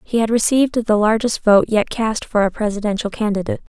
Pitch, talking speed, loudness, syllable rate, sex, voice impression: 215 Hz, 190 wpm, -18 LUFS, 6.0 syllables/s, female, feminine, slightly adult-like, slightly soft, slightly fluent, cute, slightly refreshing, slightly calm, friendly